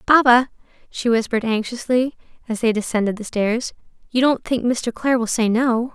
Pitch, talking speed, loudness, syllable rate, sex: 235 Hz, 170 wpm, -20 LUFS, 5.3 syllables/s, female